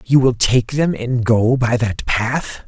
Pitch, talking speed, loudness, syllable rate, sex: 120 Hz, 200 wpm, -17 LUFS, 3.8 syllables/s, male